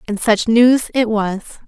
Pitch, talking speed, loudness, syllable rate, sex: 225 Hz, 180 wpm, -15 LUFS, 4.0 syllables/s, female